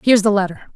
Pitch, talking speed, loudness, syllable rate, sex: 205 Hz, 240 wpm, -17 LUFS, 7.9 syllables/s, female